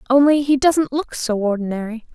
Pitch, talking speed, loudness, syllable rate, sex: 255 Hz, 170 wpm, -18 LUFS, 5.3 syllables/s, female